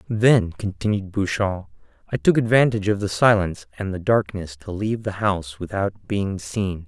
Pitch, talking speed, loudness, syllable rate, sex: 100 Hz, 165 wpm, -22 LUFS, 5.0 syllables/s, male